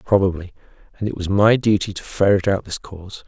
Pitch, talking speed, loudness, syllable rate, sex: 100 Hz, 200 wpm, -19 LUFS, 5.9 syllables/s, male